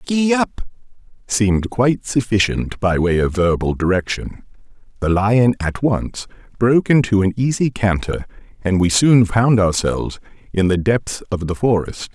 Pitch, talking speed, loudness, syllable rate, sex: 110 Hz, 150 wpm, -17 LUFS, 4.5 syllables/s, male